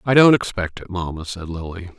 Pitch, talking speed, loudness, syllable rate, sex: 95 Hz, 210 wpm, -20 LUFS, 5.0 syllables/s, male